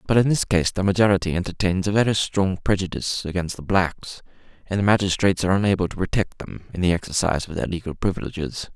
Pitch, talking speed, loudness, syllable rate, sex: 95 Hz, 190 wpm, -22 LUFS, 6.5 syllables/s, male